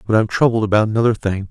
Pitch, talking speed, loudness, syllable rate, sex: 110 Hz, 280 wpm, -17 LUFS, 8.0 syllables/s, male